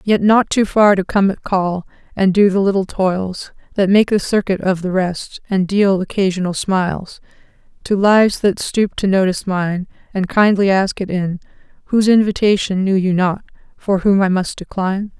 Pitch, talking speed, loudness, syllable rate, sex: 195 Hz, 180 wpm, -16 LUFS, 4.9 syllables/s, female